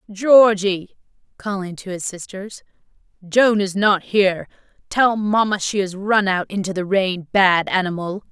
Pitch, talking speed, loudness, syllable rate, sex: 195 Hz, 135 wpm, -18 LUFS, 3.8 syllables/s, female